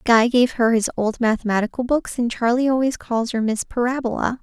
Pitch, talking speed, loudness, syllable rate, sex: 240 Hz, 190 wpm, -20 LUFS, 5.4 syllables/s, female